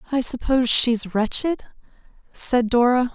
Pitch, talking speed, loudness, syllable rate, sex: 245 Hz, 115 wpm, -19 LUFS, 4.4 syllables/s, female